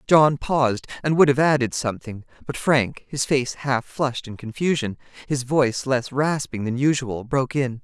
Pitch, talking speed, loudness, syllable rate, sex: 135 Hz, 175 wpm, -22 LUFS, 4.9 syllables/s, female